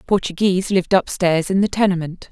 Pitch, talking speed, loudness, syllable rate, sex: 185 Hz, 155 wpm, -18 LUFS, 5.7 syllables/s, female